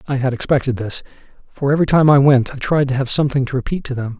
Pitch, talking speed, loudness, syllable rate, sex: 135 Hz, 255 wpm, -17 LUFS, 7.0 syllables/s, male